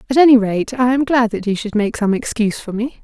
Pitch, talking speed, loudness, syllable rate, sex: 230 Hz, 275 wpm, -16 LUFS, 6.1 syllables/s, female